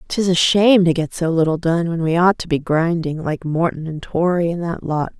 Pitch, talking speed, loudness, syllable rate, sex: 170 Hz, 245 wpm, -18 LUFS, 5.2 syllables/s, female